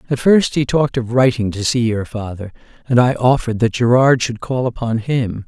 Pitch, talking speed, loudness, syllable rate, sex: 120 Hz, 210 wpm, -16 LUFS, 5.3 syllables/s, male